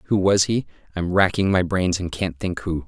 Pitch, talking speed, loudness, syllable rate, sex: 90 Hz, 230 wpm, -21 LUFS, 5.0 syllables/s, male